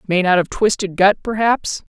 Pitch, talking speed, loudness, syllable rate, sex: 200 Hz, 185 wpm, -17 LUFS, 4.7 syllables/s, female